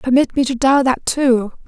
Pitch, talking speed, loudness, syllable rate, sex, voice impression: 260 Hz, 215 wpm, -16 LUFS, 4.8 syllables/s, female, feminine, adult-like, powerful, slightly weak, slightly halting, raspy, calm, friendly, reassuring, elegant, slightly lively, slightly modest